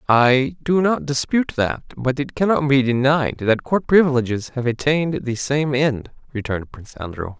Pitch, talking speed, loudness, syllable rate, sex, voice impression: 130 Hz, 170 wpm, -19 LUFS, 4.9 syllables/s, male, masculine, adult-like, slightly thin, tensed, clear, fluent, cool, calm, friendly, reassuring, slightly wild, kind, slightly modest